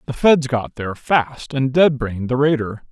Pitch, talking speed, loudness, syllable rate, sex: 130 Hz, 205 wpm, -18 LUFS, 4.8 syllables/s, male